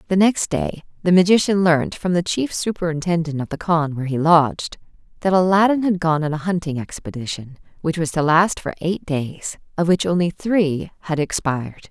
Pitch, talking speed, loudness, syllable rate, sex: 165 Hz, 185 wpm, -20 LUFS, 5.2 syllables/s, female